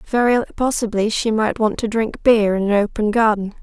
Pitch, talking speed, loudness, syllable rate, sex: 220 Hz, 200 wpm, -18 LUFS, 5.1 syllables/s, female